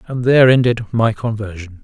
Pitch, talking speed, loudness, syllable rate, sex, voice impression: 115 Hz, 165 wpm, -15 LUFS, 5.4 syllables/s, male, very masculine, very adult-like, very middle-aged, very thick, slightly tensed, slightly powerful, bright, hard, slightly clear, fluent, cool, intellectual, sincere, calm, mature, slightly friendly, reassuring, slightly wild, kind